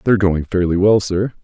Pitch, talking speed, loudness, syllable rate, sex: 95 Hz, 210 wpm, -16 LUFS, 5.6 syllables/s, male